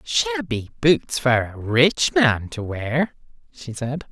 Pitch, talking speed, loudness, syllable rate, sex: 145 Hz, 145 wpm, -21 LUFS, 3.2 syllables/s, male